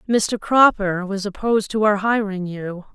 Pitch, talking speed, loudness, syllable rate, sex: 205 Hz, 165 wpm, -19 LUFS, 4.4 syllables/s, female